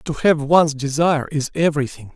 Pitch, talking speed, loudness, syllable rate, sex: 150 Hz, 165 wpm, -18 LUFS, 5.8 syllables/s, male